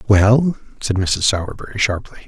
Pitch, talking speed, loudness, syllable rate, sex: 105 Hz, 130 wpm, -18 LUFS, 4.9 syllables/s, male